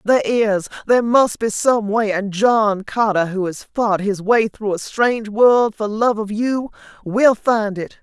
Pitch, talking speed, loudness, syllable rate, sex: 215 Hz, 195 wpm, -18 LUFS, 4.1 syllables/s, female